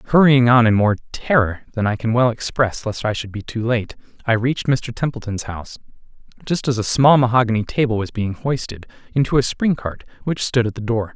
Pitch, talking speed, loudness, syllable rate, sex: 120 Hz, 210 wpm, -19 LUFS, 5.7 syllables/s, male